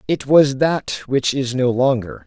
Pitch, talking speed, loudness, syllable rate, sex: 135 Hz, 185 wpm, -18 LUFS, 3.9 syllables/s, male